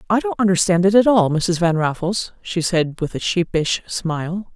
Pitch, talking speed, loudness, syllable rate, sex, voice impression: 185 Hz, 200 wpm, -19 LUFS, 4.8 syllables/s, female, feminine, adult-like, tensed, clear, fluent, intellectual, slightly calm, friendly, elegant, lively, slightly strict, slightly sharp